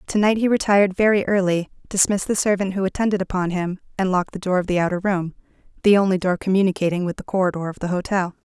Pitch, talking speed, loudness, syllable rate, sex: 190 Hz, 220 wpm, -20 LUFS, 7.0 syllables/s, female